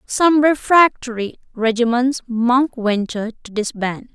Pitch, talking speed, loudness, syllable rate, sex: 245 Hz, 100 wpm, -18 LUFS, 4.1 syllables/s, female